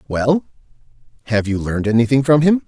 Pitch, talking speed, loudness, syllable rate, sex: 125 Hz, 155 wpm, -17 LUFS, 6.0 syllables/s, male